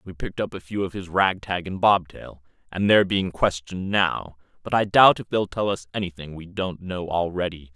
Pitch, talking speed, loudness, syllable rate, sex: 90 Hz, 210 wpm, -23 LUFS, 5.3 syllables/s, male